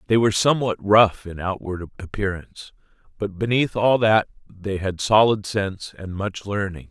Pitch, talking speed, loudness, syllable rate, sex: 100 Hz, 155 wpm, -21 LUFS, 4.8 syllables/s, male